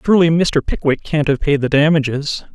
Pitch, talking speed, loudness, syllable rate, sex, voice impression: 150 Hz, 190 wpm, -16 LUFS, 5.5 syllables/s, male, very masculine, very adult-like, old, very thick, slightly relaxed, slightly powerful, slightly dark, soft, muffled, very fluent, very cool, very intellectual, sincere, very calm, very mature, friendly, very reassuring, slightly unique, very elegant, slightly wild, sweet, slightly lively, very kind, slightly modest